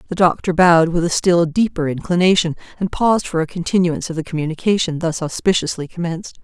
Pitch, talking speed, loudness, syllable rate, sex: 170 Hz, 175 wpm, -18 LUFS, 6.3 syllables/s, female